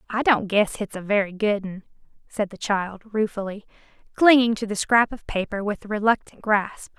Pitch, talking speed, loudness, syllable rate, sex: 210 Hz, 170 wpm, -22 LUFS, 4.7 syllables/s, female